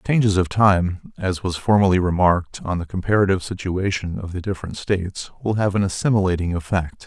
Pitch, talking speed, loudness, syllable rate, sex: 95 Hz, 180 wpm, -21 LUFS, 5.8 syllables/s, male